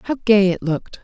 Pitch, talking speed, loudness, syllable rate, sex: 205 Hz, 230 wpm, -17 LUFS, 5.9 syllables/s, female